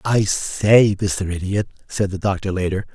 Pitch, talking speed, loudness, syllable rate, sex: 100 Hz, 165 wpm, -19 LUFS, 4.3 syllables/s, male